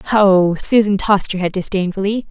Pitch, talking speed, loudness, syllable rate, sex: 195 Hz, 155 wpm, -15 LUFS, 4.9 syllables/s, female